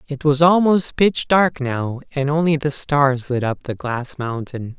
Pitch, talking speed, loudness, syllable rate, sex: 140 Hz, 190 wpm, -19 LUFS, 4.0 syllables/s, male